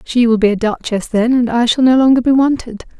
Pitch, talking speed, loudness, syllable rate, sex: 240 Hz, 260 wpm, -13 LUFS, 5.7 syllables/s, female